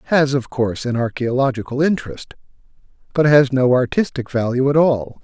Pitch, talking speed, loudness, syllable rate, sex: 130 Hz, 150 wpm, -18 LUFS, 5.5 syllables/s, male